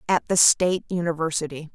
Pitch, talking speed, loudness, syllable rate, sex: 165 Hz, 135 wpm, -21 LUFS, 5.9 syllables/s, female